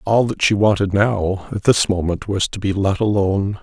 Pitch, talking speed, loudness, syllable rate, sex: 100 Hz, 215 wpm, -18 LUFS, 4.9 syllables/s, male